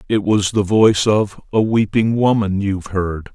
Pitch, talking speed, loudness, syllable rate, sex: 105 Hz, 180 wpm, -17 LUFS, 4.3 syllables/s, male